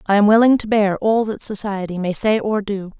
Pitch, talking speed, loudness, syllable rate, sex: 205 Hz, 240 wpm, -18 LUFS, 5.3 syllables/s, female